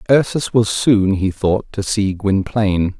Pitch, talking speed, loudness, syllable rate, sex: 105 Hz, 160 wpm, -17 LUFS, 4.1 syllables/s, male